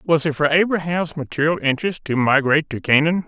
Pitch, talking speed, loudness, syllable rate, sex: 155 Hz, 185 wpm, -19 LUFS, 5.9 syllables/s, male